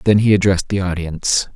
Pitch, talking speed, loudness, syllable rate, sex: 95 Hz, 190 wpm, -17 LUFS, 6.4 syllables/s, male